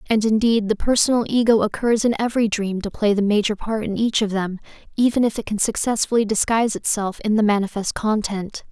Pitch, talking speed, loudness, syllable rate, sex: 215 Hz, 200 wpm, -20 LUFS, 5.8 syllables/s, female